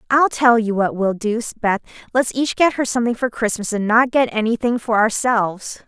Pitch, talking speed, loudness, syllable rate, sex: 230 Hz, 215 wpm, -18 LUFS, 5.3 syllables/s, female